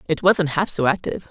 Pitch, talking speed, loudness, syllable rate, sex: 185 Hz, 230 wpm, -20 LUFS, 6.2 syllables/s, female